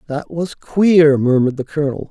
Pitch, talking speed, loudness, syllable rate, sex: 150 Hz, 170 wpm, -16 LUFS, 5.2 syllables/s, male